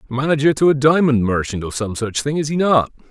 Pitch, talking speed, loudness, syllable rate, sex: 135 Hz, 230 wpm, -17 LUFS, 5.8 syllables/s, male